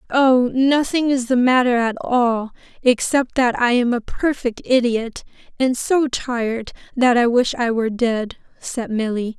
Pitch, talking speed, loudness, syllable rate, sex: 245 Hz, 160 wpm, -18 LUFS, 4.1 syllables/s, female